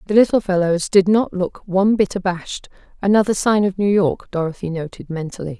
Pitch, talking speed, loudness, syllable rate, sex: 190 Hz, 170 wpm, -18 LUFS, 5.7 syllables/s, female